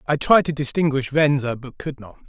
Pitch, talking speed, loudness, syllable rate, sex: 140 Hz, 210 wpm, -20 LUFS, 5.4 syllables/s, male